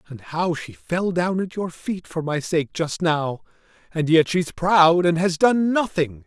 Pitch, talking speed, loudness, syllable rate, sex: 170 Hz, 200 wpm, -21 LUFS, 3.9 syllables/s, male